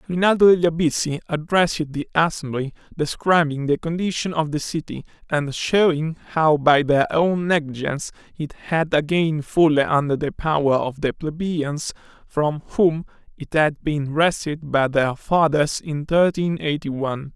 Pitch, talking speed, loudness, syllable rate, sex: 155 Hz, 145 wpm, -21 LUFS, 4.5 syllables/s, male